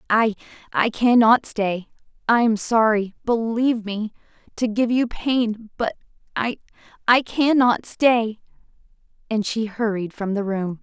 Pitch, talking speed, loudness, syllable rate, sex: 225 Hz, 120 wpm, -21 LUFS, 4.1 syllables/s, female